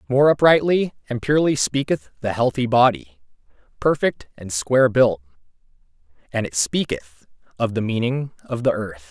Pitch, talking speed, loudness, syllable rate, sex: 120 Hz, 140 wpm, -20 LUFS, 4.9 syllables/s, male